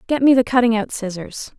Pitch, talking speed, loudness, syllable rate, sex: 235 Hz, 225 wpm, -17 LUFS, 5.7 syllables/s, female